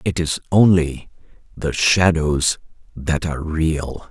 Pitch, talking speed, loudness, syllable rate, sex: 80 Hz, 115 wpm, -19 LUFS, 3.6 syllables/s, male